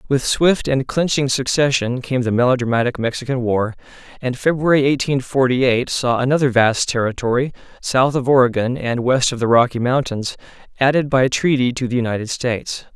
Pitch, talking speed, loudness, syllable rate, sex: 130 Hz, 160 wpm, -18 LUFS, 5.4 syllables/s, male